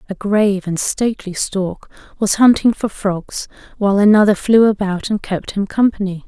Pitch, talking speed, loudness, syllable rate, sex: 200 Hz, 165 wpm, -16 LUFS, 4.9 syllables/s, female